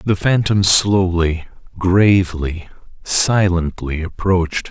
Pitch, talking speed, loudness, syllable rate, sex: 90 Hz, 75 wpm, -16 LUFS, 3.5 syllables/s, male